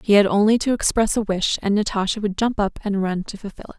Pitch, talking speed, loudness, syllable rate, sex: 205 Hz, 270 wpm, -20 LUFS, 6.2 syllables/s, female